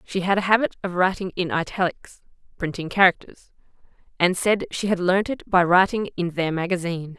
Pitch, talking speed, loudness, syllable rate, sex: 180 Hz, 175 wpm, -22 LUFS, 5.2 syllables/s, female